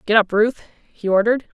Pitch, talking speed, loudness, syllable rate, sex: 215 Hz, 190 wpm, -18 LUFS, 5.4 syllables/s, female